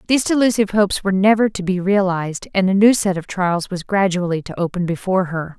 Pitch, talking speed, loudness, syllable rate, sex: 190 Hz, 215 wpm, -18 LUFS, 6.4 syllables/s, female